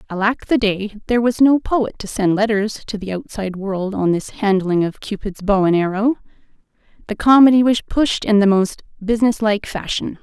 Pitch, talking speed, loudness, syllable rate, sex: 210 Hz, 190 wpm, -17 LUFS, 5.1 syllables/s, female